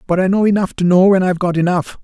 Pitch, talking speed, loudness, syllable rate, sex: 185 Hz, 295 wpm, -14 LUFS, 7.0 syllables/s, male